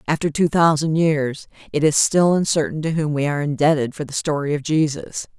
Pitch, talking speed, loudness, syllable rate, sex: 150 Hz, 200 wpm, -19 LUFS, 5.5 syllables/s, female